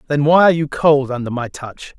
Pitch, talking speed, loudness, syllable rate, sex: 145 Hz, 240 wpm, -15 LUFS, 5.7 syllables/s, male